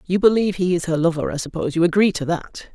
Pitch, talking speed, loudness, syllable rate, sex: 175 Hz, 240 wpm, -20 LUFS, 6.9 syllables/s, female